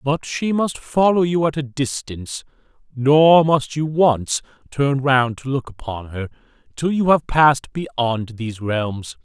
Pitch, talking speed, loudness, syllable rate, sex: 135 Hz, 160 wpm, -19 LUFS, 4.1 syllables/s, male